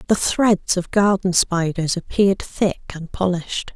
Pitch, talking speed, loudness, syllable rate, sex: 185 Hz, 145 wpm, -19 LUFS, 4.4 syllables/s, female